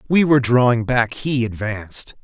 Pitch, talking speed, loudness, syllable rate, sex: 120 Hz, 160 wpm, -18 LUFS, 5.1 syllables/s, male